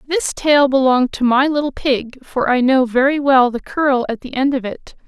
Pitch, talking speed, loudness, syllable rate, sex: 265 Hz, 225 wpm, -16 LUFS, 4.8 syllables/s, female